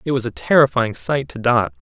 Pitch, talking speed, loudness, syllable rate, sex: 125 Hz, 225 wpm, -18 LUFS, 5.4 syllables/s, male